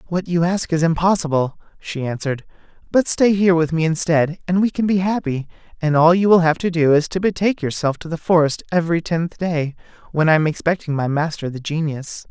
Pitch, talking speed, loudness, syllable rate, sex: 165 Hz, 210 wpm, -19 LUFS, 5.8 syllables/s, male